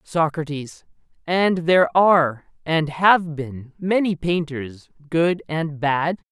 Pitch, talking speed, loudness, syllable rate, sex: 160 Hz, 115 wpm, -20 LUFS, 3.4 syllables/s, male